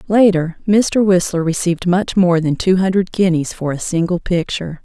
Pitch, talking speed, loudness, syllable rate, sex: 180 Hz, 175 wpm, -16 LUFS, 5.0 syllables/s, female